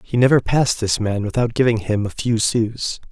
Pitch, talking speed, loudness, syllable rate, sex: 115 Hz, 210 wpm, -19 LUFS, 5.1 syllables/s, male